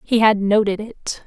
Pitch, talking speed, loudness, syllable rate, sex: 210 Hz, 190 wpm, -18 LUFS, 4.3 syllables/s, female